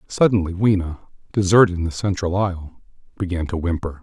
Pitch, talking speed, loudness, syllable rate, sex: 90 Hz, 150 wpm, -20 LUFS, 5.8 syllables/s, male